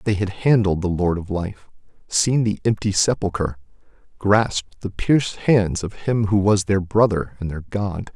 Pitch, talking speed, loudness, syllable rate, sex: 95 Hz, 175 wpm, -20 LUFS, 4.4 syllables/s, male